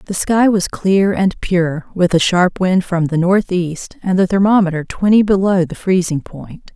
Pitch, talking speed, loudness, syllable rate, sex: 185 Hz, 185 wpm, -15 LUFS, 4.3 syllables/s, female